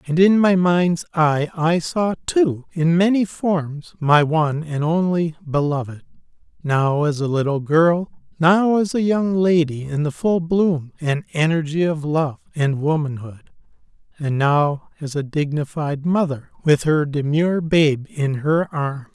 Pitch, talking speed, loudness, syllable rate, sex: 160 Hz, 155 wpm, -19 LUFS, 3.9 syllables/s, male